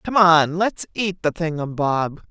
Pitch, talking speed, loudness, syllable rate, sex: 170 Hz, 210 wpm, -20 LUFS, 3.9 syllables/s, female